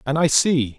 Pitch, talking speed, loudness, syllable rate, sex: 145 Hz, 230 wpm, -18 LUFS, 4.5 syllables/s, male